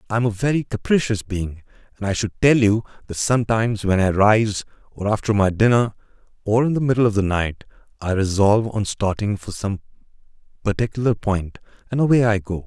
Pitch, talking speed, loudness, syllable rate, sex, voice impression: 105 Hz, 185 wpm, -20 LUFS, 5.8 syllables/s, male, very masculine, very adult-like, slightly thick, cool, calm, wild